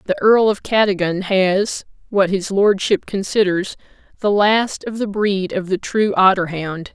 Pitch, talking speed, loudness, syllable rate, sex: 195 Hz, 165 wpm, -17 LUFS, 4.2 syllables/s, female